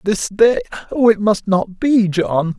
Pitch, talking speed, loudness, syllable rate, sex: 200 Hz, 165 wpm, -16 LUFS, 3.8 syllables/s, male